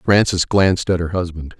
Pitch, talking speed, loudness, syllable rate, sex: 90 Hz, 190 wpm, -18 LUFS, 5.2 syllables/s, male